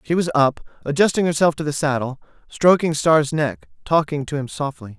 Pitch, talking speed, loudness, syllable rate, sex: 150 Hz, 180 wpm, -20 LUFS, 5.3 syllables/s, male